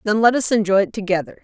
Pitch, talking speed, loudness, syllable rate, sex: 210 Hz, 250 wpm, -18 LUFS, 6.9 syllables/s, female